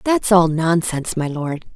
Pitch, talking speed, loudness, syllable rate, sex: 170 Hz, 170 wpm, -18 LUFS, 4.5 syllables/s, female